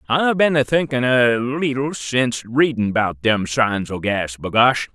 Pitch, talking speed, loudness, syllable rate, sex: 125 Hz, 170 wpm, -18 LUFS, 4.0 syllables/s, male